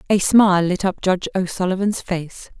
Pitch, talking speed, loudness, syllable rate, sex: 185 Hz, 160 wpm, -19 LUFS, 5.4 syllables/s, female